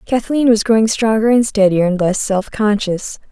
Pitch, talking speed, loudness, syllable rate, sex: 215 Hz, 180 wpm, -15 LUFS, 4.8 syllables/s, female